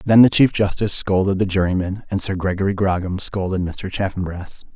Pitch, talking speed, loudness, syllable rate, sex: 95 Hz, 175 wpm, -19 LUFS, 5.5 syllables/s, male